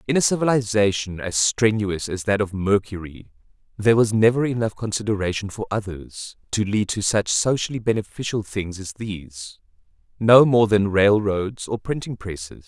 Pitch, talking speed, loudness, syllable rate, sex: 105 Hz, 150 wpm, -21 LUFS, 5.0 syllables/s, male